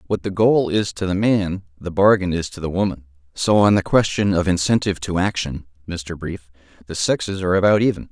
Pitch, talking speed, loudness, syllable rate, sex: 90 Hz, 205 wpm, -19 LUFS, 5.6 syllables/s, male